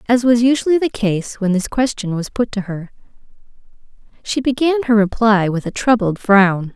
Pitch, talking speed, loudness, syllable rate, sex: 220 Hz, 180 wpm, -16 LUFS, 4.9 syllables/s, female